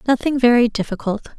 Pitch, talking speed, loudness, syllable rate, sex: 240 Hz, 130 wpm, -18 LUFS, 6.5 syllables/s, female